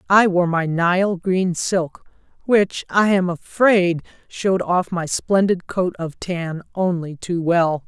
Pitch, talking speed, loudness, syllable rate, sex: 180 Hz, 150 wpm, -19 LUFS, 3.5 syllables/s, female